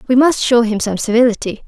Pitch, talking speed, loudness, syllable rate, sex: 240 Hz, 215 wpm, -14 LUFS, 6.0 syllables/s, female